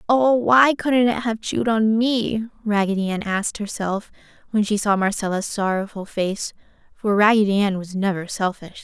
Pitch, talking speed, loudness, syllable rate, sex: 210 Hz, 165 wpm, -21 LUFS, 4.8 syllables/s, female